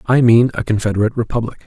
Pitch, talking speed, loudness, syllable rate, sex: 115 Hz, 180 wpm, -16 LUFS, 7.6 syllables/s, male